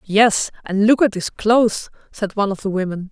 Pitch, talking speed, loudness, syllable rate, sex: 210 Hz, 210 wpm, -18 LUFS, 5.3 syllables/s, female